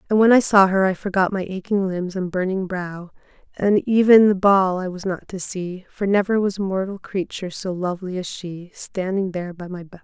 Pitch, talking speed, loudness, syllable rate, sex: 190 Hz, 215 wpm, -20 LUFS, 5.2 syllables/s, female